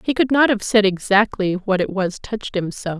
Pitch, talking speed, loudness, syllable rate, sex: 205 Hz, 240 wpm, -19 LUFS, 5.2 syllables/s, female